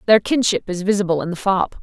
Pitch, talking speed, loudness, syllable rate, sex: 195 Hz, 230 wpm, -19 LUFS, 6.2 syllables/s, female